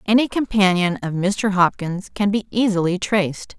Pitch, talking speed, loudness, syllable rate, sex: 195 Hz, 150 wpm, -19 LUFS, 4.8 syllables/s, female